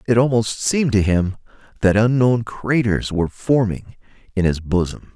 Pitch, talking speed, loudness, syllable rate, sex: 110 Hz, 150 wpm, -19 LUFS, 4.8 syllables/s, male